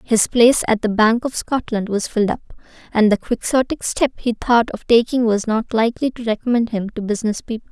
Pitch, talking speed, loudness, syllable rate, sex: 225 Hz, 210 wpm, -18 LUFS, 5.7 syllables/s, female